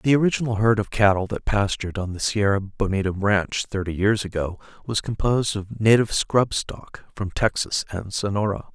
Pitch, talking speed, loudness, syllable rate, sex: 105 Hz, 170 wpm, -23 LUFS, 5.2 syllables/s, male